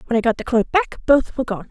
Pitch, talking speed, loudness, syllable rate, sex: 250 Hz, 315 wpm, -19 LUFS, 6.9 syllables/s, female